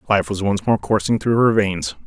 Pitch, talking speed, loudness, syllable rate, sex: 100 Hz, 235 wpm, -19 LUFS, 5.0 syllables/s, male